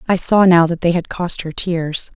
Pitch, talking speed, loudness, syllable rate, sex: 175 Hz, 245 wpm, -16 LUFS, 4.6 syllables/s, female